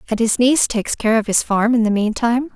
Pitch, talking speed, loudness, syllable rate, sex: 230 Hz, 260 wpm, -17 LUFS, 6.4 syllables/s, female